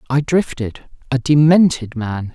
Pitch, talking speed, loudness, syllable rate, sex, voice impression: 135 Hz, 100 wpm, -16 LUFS, 4.1 syllables/s, male, masculine, adult-like, refreshing, slightly unique